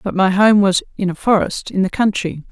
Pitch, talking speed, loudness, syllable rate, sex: 195 Hz, 240 wpm, -16 LUFS, 5.4 syllables/s, female